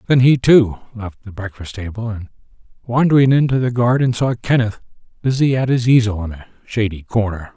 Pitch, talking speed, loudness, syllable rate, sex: 115 Hz, 175 wpm, -17 LUFS, 5.5 syllables/s, male